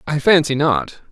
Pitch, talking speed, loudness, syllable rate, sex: 145 Hz, 160 wpm, -16 LUFS, 4.4 syllables/s, male